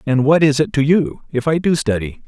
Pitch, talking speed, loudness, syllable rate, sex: 145 Hz, 265 wpm, -16 LUFS, 5.3 syllables/s, male